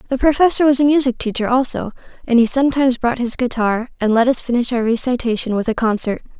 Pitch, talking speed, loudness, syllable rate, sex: 245 Hz, 205 wpm, -16 LUFS, 6.4 syllables/s, female